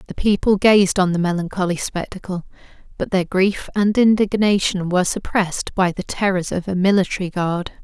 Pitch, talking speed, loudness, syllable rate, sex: 190 Hz, 160 wpm, -19 LUFS, 5.3 syllables/s, female